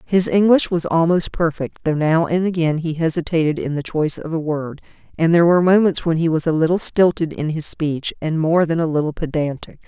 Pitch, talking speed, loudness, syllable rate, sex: 160 Hz, 220 wpm, -18 LUFS, 5.6 syllables/s, female